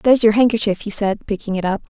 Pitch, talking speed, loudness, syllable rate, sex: 210 Hz, 240 wpm, -18 LUFS, 6.8 syllables/s, female